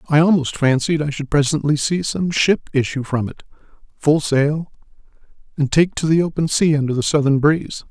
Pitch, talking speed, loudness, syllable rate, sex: 150 Hz, 180 wpm, -18 LUFS, 5.3 syllables/s, male